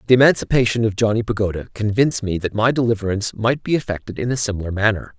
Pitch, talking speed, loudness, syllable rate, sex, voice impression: 110 Hz, 195 wpm, -19 LUFS, 7.1 syllables/s, male, masculine, adult-like, slightly thick, fluent, cool, sincere, slightly kind